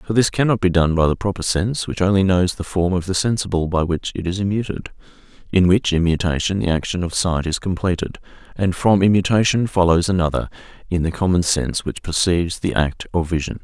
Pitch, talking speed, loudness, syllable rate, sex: 90 Hz, 200 wpm, -19 LUFS, 6.0 syllables/s, male